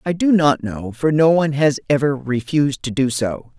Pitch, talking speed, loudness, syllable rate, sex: 140 Hz, 215 wpm, -18 LUFS, 5.1 syllables/s, female